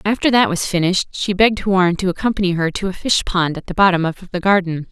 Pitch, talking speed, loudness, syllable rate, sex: 185 Hz, 245 wpm, -17 LUFS, 6.1 syllables/s, female